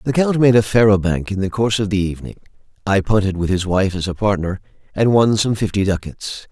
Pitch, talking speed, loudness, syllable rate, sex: 100 Hz, 230 wpm, -17 LUFS, 5.9 syllables/s, male